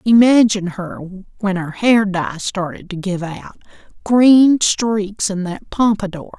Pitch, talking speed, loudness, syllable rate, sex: 200 Hz, 130 wpm, -16 LUFS, 3.7 syllables/s, female